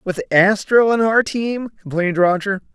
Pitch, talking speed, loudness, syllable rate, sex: 200 Hz, 155 wpm, -17 LUFS, 4.7 syllables/s, male